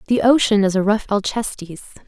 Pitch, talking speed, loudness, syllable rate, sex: 210 Hz, 175 wpm, -18 LUFS, 5.5 syllables/s, female